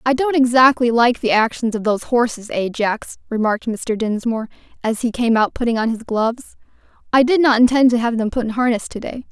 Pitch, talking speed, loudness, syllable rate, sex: 235 Hz, 215 wpm, -18 LUFS, 5.9 syllables/s, female